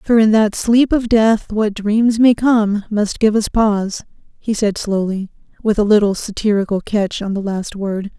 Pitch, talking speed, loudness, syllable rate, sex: 210 Hz, 190 wpm, -16 LUFS, 4.4 syllables/s, female